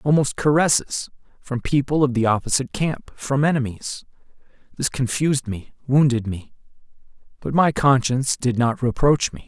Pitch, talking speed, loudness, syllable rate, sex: 130 Hz, 140 wpm, -21 LUFS, 5.2 syllables/s, male